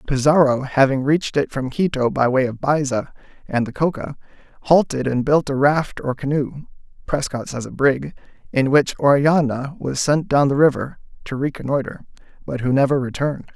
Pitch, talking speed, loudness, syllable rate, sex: 140 Hz, 170 wpm, -19 LUFS, 5.0 syllables/s, male